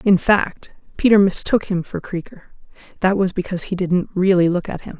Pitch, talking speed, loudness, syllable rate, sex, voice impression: 185 Hz, 190 wpm, -18 LUFS, 5.2 syllables/s, female, feminine, very adult-like, slightly soft, calm, slightly sweet